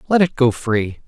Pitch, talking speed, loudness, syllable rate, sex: 135 Hz, 225 wpm, -18 LUFS, 4.6 syllables/s, male